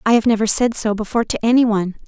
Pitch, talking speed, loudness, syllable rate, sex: 220 Hz, 260 wpm, -17 LUFS, 7.6 syllables/s, female